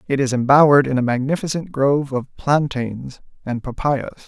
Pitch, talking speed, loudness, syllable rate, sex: 135 Hz, 155 wpm, -19 LUFS, 5.3 syllables/s, male